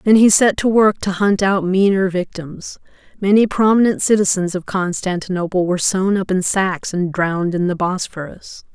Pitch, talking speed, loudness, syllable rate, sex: 190 Hz, 170 wpm, -16 LUFS, 5.0 syllables/s, female